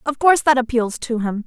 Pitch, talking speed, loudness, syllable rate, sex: 250 Hz, 245 wpm, -18 LUFS, 5.9 syllables/s, female